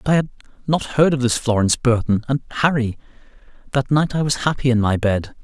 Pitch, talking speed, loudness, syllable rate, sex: 125 Hz, 210 wpm, -19 LUFS, 6.1 syllables/s, male